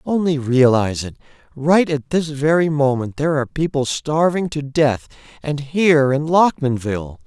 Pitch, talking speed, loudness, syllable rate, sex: 145 Hz, 130 wpm, -18 LUFS, 4.9 syllables/s, male